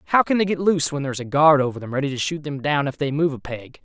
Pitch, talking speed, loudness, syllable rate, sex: 145 Hz, 330 wpm, -21 LUFS, 7.0 syllables/s, male